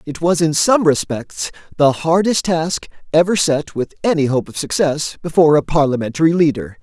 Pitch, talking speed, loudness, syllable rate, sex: 155 Hz, 165 wpm, -16 LUFS, 5.1 syllables/s, male